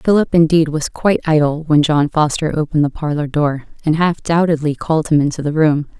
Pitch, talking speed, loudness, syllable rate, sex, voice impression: 155 Hz, 200 wpm, -16 LUFS, 5.7 syllables/s, female, feminine, adult-like, slightly intellectual, calm, elegant, slightly sweet